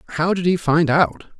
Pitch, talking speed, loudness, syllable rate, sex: 160 Hz, 215 wpm, -18 LUFS, 5.3 syllables/s, male